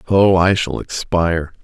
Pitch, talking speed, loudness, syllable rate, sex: 90 Hz, 145 wpm, -16 LUFS, 4.3 syllables/s, male